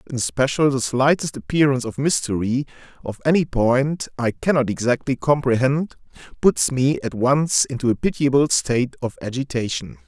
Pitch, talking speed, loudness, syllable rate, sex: 130 Hz, 130 wpm, -20 LUFS, 5.1 syllables/s, male